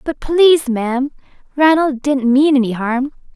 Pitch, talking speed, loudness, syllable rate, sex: 270 Hz, 145 wpm, -15 LUFS, 4.5 syllables/s, female